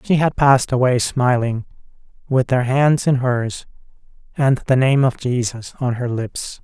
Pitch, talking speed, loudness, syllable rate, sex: 130 Hz, 165 wpm, -18 LUFS, 4.3 syllables/s, male